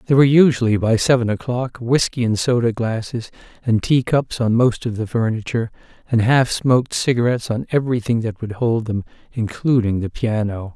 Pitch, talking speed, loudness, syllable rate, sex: 115 Hz, 175 wpm, -19 LUFS, 5.5 syllables/s, male